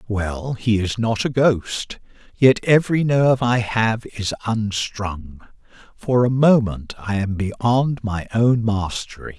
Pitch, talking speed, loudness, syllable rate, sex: 110 Hz, 140 wpm, -20 LUFS, 3.9 syllables/s, male